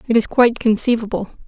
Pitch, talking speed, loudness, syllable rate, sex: 225 Hz, 160 wpm, -17 LUFS, 6.8 syllables/s, female